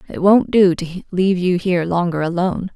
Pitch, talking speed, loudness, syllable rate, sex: 180 Hz, 195 wpm, -17 LUFS, 5.6 syllables/s, female